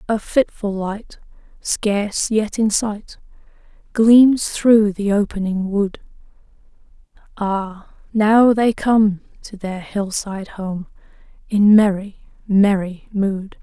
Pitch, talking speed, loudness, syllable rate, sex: 205 Hz, 110 wpm, -18 LUFS, 3.1 syllables/s, female